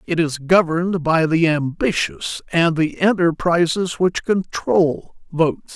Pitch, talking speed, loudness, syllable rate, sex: 165 Hz, 125 wpm, -18 LUFS, 3.9 syllables/s, male